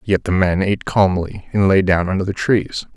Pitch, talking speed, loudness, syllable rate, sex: 95 Hz, 225 wpm, -17 LUFS, 5.1 syllables/s, male